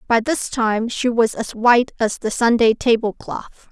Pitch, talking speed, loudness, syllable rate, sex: 230 Hz, 180 wpm, -18 LUFS, 4.3 syllables/s, female